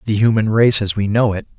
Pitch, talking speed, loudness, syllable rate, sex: 110 Hz, 265 wpm, -16 LUFS, 6.0 syllables/s, male